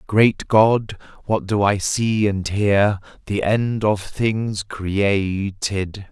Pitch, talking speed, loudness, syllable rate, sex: 100 Hz, 130 wpm, -20 LUFS, 2.6 syllables/s, male